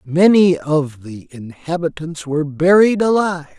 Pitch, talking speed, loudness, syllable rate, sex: 165 Hz, 115 wpm, -15 LUFS, 4.5 syllables/s, male